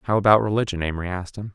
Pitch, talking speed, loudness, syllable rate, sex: 100 Hz, 230 wpm, -22 LUFS, 8.0 syllables/s, male